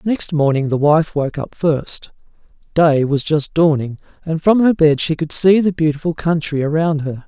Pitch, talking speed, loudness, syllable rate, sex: 155 Hz, 190 wpm, -16 LUFS, 4.6 syllables/s, male